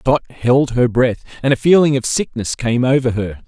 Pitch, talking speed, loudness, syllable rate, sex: 125 Hz, 205 wpm, -16 LUFS, 4.9 syllables/s, male